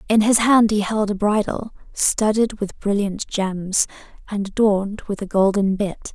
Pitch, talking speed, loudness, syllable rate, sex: 205 Hz, 165 wpm, -20 LUFS, 4.4 syllables/s, female